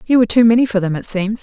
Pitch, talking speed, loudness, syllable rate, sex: 215 Hz, 335 wpm, -15 LUFS, 7.5 syllables/s, female